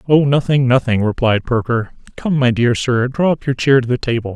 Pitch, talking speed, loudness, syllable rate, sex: 125 Hz, 220 wpm, -16 LUFS, 5.3 syllables/s, male